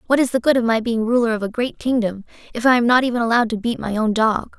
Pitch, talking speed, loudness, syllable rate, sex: 230 Hz, 300 wpm, -19 LUFS, 6.8 syllables/s, female